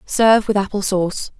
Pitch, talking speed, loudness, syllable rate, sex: 200 Hz, 170 wpm, -17 LUFS, 5.7 syllables/s, female